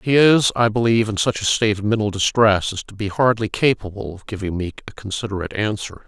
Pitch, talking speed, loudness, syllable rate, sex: 105 Hz, 215 wpm, -19 LUFS, 6.3 syllables/s, male